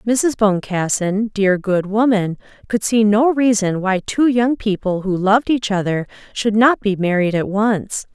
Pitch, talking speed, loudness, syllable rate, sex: 210 Hz, 170 wpm, -17 LUFS, 4.2 syllables/s, female